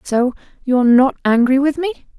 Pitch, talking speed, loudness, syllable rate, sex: 265 Hz, 165 wpm, -15 LUFS, 5.0 syllables/s, female